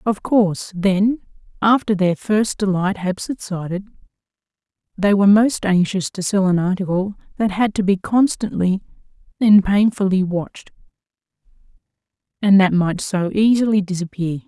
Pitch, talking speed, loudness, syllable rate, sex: 195 Hz, 130 wpm, -18 LUFS, 4.7 syllables/s, female